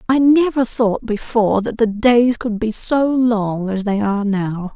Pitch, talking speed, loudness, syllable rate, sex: 225 Hz, 190 wpm, -17 LUFS, 4.2 syllables/s, female